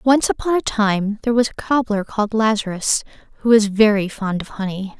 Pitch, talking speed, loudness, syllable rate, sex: 215 Hz, 190 wpm, -19 LUFS, 5.4 syllables/s, female